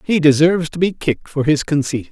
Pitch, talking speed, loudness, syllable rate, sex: 155 Hz, 225 wpm, -16 LUFS, 6.0 syllables/s, male